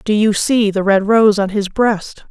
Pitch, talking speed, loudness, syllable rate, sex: 205 Hz, 235 wpm, -14 LUFS, 4.2 syllables/s, female